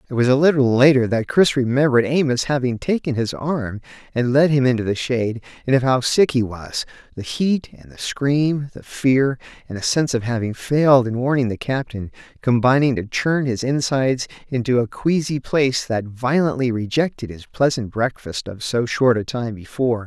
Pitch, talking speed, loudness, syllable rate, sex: 125 Hz, 185 wpm, -19 LUFS, 5.2 syllables/s, male